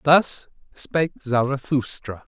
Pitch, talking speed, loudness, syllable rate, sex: 135 Hz, 75 wpm, -23 LUFS, 3.8 syllables/s, male